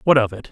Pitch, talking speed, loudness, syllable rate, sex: 120 Hz, 350 wpm, -18 LUFS, 7.5 syllables/s, male